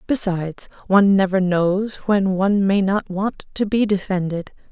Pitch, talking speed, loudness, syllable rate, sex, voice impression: 195 Hz, 155 wpm, -19 LUFS, 4.6 syllables/s, female, very feminine, adult-like, slightly intellectual, elegant